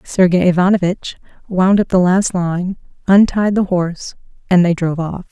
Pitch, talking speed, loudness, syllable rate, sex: 185 Hz, 160 wpm, -15 LUFS, 5.0 syllables/s, female